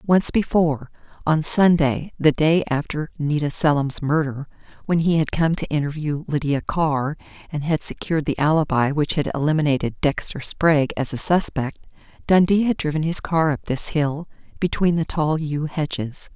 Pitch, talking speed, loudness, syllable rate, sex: 155 Hz, 155 wpm, -21 LUFS, 4.9 syllables/s, female